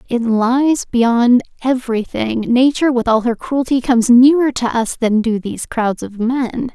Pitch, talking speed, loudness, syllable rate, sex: 240 Hz, 170 wpm, -15 LUFS, 4.5 syllables/s, female